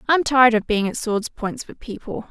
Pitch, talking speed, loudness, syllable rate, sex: 235 Hz, 235 wpm, -20 LUFS, 5.1 syllables/s, female